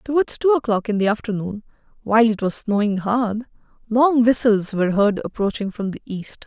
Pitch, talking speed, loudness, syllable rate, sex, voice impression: 220 Hz, 175 wpm, -20 LUFS, 5.3 syllables/s, female, very feminine, adult-like, slightly middle-aged, thin, tensed, slightly powerful, bright, hard, clear, slightly fluent, cute, very intellectual, refreshing, sincere, slightly calm, friendly, reassuring, very unique, slightly elegant, wild, slightly sweet, lively, strict, intense, sharp